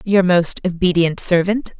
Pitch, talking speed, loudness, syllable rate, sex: 180 Hz, 135 wpm, -16 LUFS, 4.2 syllables/s, female